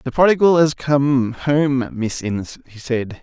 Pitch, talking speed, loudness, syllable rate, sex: 135 Hz, 170 wpm, -18 LUFS, 4.0 syllables/s, male